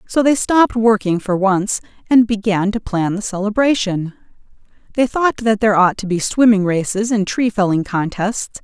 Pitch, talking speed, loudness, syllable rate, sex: 210 Hz, 175 wpm, -16 LUFS, 4.9 syllables/s, female